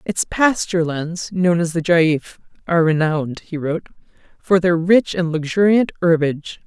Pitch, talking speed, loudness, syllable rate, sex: 170 Hz, 155 wpm, -18 LUFS, 5.0 syllables/s, female